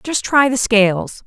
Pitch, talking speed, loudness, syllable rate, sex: 230 Hz, 190 wpm, -15 LUFS, 4.1 syllables/s, female